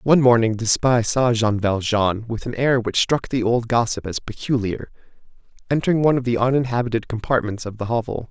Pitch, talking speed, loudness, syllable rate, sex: 115 Hz, 190 wpm, -20 LUFS, 5.6 syllables/s, male